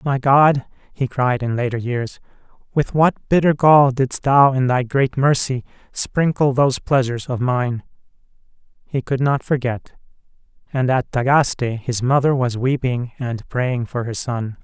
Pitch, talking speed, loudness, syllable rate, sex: 130 Hz, 155 wpm, -18 LUFS, 4.3 syllables/s, male